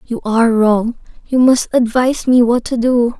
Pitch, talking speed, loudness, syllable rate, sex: 240 Hz, 190 wpm, -14 LUFS, 4.7 syllables/s, female